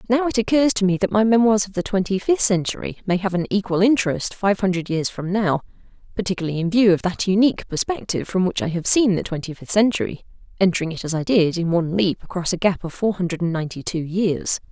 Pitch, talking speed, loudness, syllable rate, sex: 190 Hz, 225 wpm, -20 LUFS, 6.2 syllables/s, female